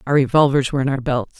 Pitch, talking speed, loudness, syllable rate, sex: 135 Hz, 260 wpm, -18 LUFS, 7.1 syllables/s, female